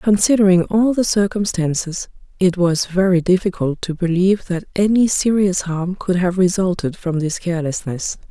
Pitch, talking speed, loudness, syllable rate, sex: 185 Hz, 145 wpm, -18 LUFS, 4.9 syllables/s, female